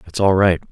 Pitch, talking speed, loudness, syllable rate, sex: 90 Hz, 250 wpm, -16 LUFS, 6.3 syllables/s, male